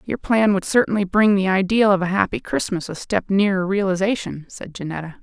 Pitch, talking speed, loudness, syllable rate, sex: 195 Hz, 195 wpm, -19 LUFS, 5.5 syllables/s, female